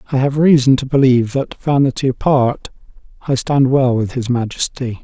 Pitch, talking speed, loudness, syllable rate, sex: 130 Hz, 165 wpm, -15 LUFS, 5.2 syllables/s, male